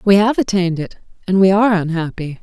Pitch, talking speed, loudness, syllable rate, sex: 190 Hz, 200 wpm, -16 LUFS, 6.3 syllables/s, female